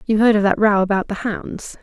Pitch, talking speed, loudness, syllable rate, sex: 205 Hz, 265 wpm, -18 LUFS, 5.3 syllables/s, female